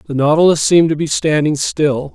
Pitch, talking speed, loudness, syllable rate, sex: 150 Hz, 195 wpm, -14 LUFS, 5.5 syllables/s, male